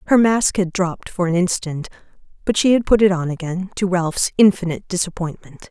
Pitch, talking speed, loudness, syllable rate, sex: 185 Hz, 190 wpm, -18 LUFS, 5.6 syllables/s, female